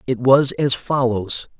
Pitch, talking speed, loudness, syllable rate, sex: 125 Hz, 150 wpm, -18 LUFS, 3.8 syllables/s, male